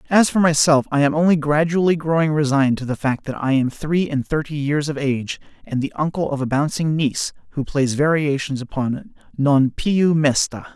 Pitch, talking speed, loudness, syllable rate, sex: 150 Hz, 195 wpm, -19 LUFS, 5.3 syllables/s, male